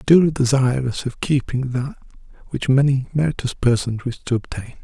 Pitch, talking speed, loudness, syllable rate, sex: 130 Hz, 150 wpm, -20 LUFS, 5.6 syllables/s, male